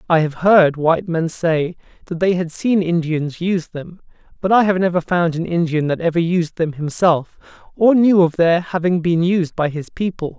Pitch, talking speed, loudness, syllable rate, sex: 170 Hz, 200 wpm, -17 LUFS, 4.8 syllables/s, male